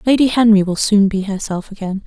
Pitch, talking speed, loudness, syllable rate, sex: 205 Hz, 205 wpm, -15 LUFS, 5.7 syllables/s, female